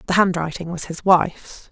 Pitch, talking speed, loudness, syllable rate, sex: 175 Hz, 175 wpm, -20 LUFS, 5.2 syllables/s, female